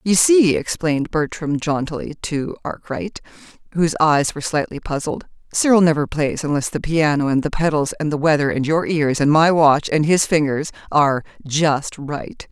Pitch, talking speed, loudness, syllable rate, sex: 155 Hz, 175 wpm, -18 LUFS, 4.9 syllables/s, female